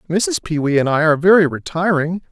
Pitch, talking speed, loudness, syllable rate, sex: 170 Hz, 180 wpm, -16 LUFS, 6.0 syllables/s, male